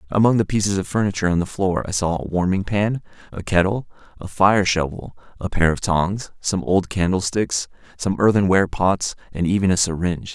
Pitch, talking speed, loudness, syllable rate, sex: 95 Hz, 190 wpm, -20 LUFS, 5.5 syllables/s, male